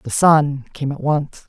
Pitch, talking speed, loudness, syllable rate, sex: 145 Hz, 205 wpm, -18 LUFS, 3.7 syllables/s, female